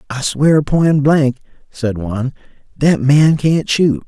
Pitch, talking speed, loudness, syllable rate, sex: 140 Hz, 145 wpm, -14 LUFS, 3.5 syllables/s, male